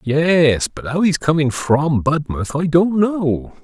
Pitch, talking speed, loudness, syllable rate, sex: 155 Hz, 165 wpm, -17 LUFS, 3.5 syllables/s, male